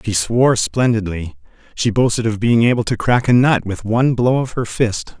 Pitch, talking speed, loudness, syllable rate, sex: 115 Hz, 210 wpm, -16 LUFS, 5.1 syllables/s, male